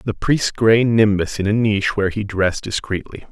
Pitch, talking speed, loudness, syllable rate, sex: 105 Hz, 200 wpm, -18 LUFS, 5.4 syllables/s, male